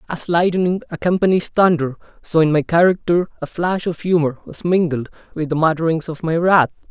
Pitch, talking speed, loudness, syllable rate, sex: 165 Hz, 175 wpm, -18 LUFS, 5.4 syllables/s, male